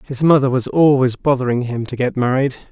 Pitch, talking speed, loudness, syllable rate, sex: 130 Hz, 200 wpm, -16 LUFS, 5.7 syllables/s, male